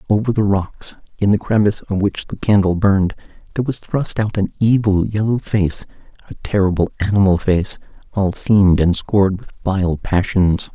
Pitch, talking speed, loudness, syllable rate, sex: 100 Hz, 170 wpm, -17 LUFS, 5.1 syllables/s, male